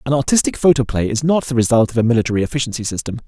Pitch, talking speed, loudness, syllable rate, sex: 125 Hz, 220 wpm, -17 LUFS, 7.7 syllables/s, male